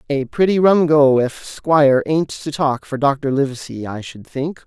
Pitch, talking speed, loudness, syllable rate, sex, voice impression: 145 Hz, 195 wpm, -17 LUFS, 4.3 syllables/s, male, masculine, adult-like, slightly refreshing, unique